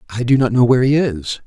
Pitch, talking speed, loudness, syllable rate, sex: 120 Hz, 285 wpm, -15 LUFS, 6.3 syllables/s, male